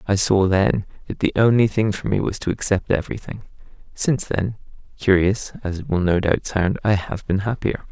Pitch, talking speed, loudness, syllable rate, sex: 100 Hz, 180 wpm, -21 LUFS, 5.3 syllables/s, male